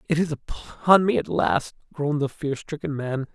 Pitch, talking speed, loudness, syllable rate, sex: 140 Hz, 200 wpm, -24 LUFS, 4.8 syllables/s, male